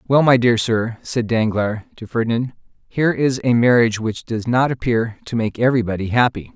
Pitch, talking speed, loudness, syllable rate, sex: 120 Hz, 185 wpm, -18 LUFS, 5.3 syllables/s, male